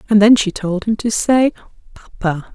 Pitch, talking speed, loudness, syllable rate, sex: 210 Hz, 190 wpm, -16 LUFS, 4.6 syllables/s, female